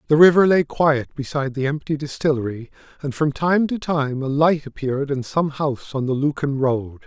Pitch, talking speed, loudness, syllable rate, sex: 145 Hz, 195 wpm, -20 LUFS, 5.4 syllables/s, male